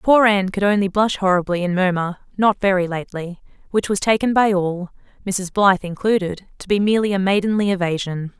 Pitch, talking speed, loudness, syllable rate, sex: 195 Hz, 180 wpm, -19 LUFS, 5.9 syllables/s, female